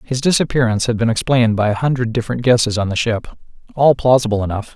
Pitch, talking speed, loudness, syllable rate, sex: 120 Hz, 190 wpm, -16 LUFS, 7.0 syllables/s, male